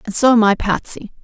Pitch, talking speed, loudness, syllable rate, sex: 220 Hz, 245 wpm, -15 LUFS, 5.8 syllables/s, female